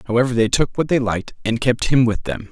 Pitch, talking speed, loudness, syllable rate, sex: 120 Hz, 265 wpm, -19 LUFS, 6.3 syllables/s, male